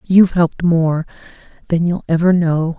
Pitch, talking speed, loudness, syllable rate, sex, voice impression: 170 Hz, 130 wpm, -15 LUFS, 5.1 syllables/s, female, feminine, middle-aged, powerful, slightly hard, raspy, slightly friendly, lively, intense, sharp